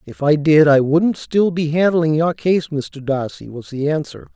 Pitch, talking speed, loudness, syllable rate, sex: 155 Hz, 205 wpm, -17 LUFS, 4.3 syllables/s, male